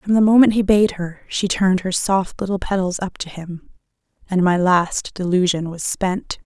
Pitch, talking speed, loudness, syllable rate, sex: 185 Hz, 185 wpm, -19 LUFS, 4.7 syllables/s, female